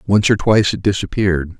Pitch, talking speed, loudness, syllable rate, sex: 100 Hz, 190 wpm, -16 LUFS, 6.3 syllables/s, male